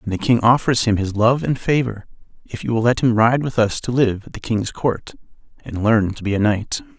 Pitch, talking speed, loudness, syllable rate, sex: 115 Hz, 250 wpm, -19 LUFS, 5.3 syllables/s, male